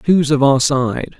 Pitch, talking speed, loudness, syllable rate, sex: 140 Hz, 200 wpm, -15 LUFS, 4.0 syllables/s, male